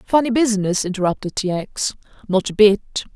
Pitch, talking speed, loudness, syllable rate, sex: 205 Hz, 150 wpm, -19 LUFS, 5.3 syllables/s, female